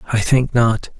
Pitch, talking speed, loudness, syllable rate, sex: 120 Hz, 180 wpm, -17 LUFS, 4.2 syllables/s, male